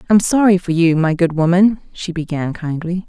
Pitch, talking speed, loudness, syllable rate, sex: 175 Hz, 195 wpm, -16 LUFS, 5.1 syllables/s, female